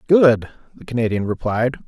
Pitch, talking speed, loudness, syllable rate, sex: 120 Hz, 130 wpm, -19 LUFS, 5.3 syllables/s, male